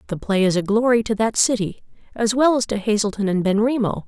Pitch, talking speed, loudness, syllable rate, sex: 215 Hz, 220 wpm, -19 LUFS, 6.0 syllables/s, female